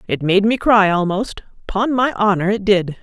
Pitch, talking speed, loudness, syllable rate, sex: 200 Hz, 200 wpm, -16 LUFS, 4.7 syllables/s, female